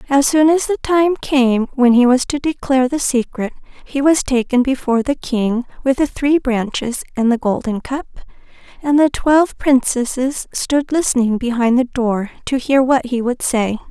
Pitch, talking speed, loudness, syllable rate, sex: 260 Hz, 180 wpm, -16 LUFS, 4.7 syllables/s, female